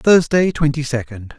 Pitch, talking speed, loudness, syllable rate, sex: 140 Hz, 130 wpm, -17 LUFS, 4.7 syllables/s, male